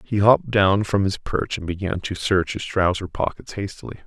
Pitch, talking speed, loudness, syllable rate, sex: 95 Hz, 205 wpm, -22 LUFS, 5.1 syllables/s, male